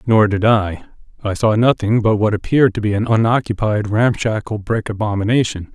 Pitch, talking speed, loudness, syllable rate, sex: 110 Hz, 155 wpm, -17 LUFS, 5.4 syllables/s, male